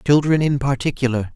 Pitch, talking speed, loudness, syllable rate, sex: 135 Hz, 135 wpm, -19 LUFS, 5.8 syllables/s, male